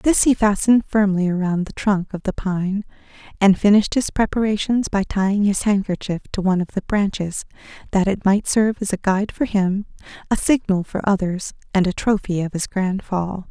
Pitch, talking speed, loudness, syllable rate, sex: 200 Hz, 190 wpm, -20 LUFS, 5.3 syllables/s, female